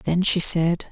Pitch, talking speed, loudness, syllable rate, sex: 175 Hz, 200 wpm, -19 LUFS, 3.9 syllables/s, female